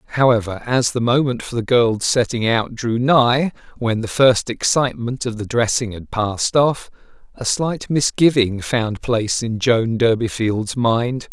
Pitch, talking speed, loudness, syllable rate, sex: 120 Hz, 160 wpm, -18 LUFS, 4.3 syllables/s, male